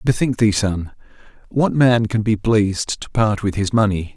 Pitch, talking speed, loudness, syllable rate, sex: 105 Hz, 175 wpm, -18 LUFS, 4.6 syllables/s, male